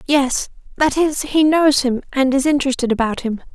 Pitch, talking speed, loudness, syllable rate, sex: 275 Hz, 170 wpm, -17 LUFS, 5.1 syllables/s, female